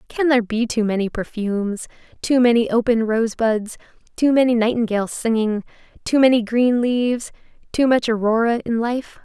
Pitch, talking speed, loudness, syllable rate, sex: 230 Hz, 155 wpm, -19 LUFS, 5.2 syllables/s, female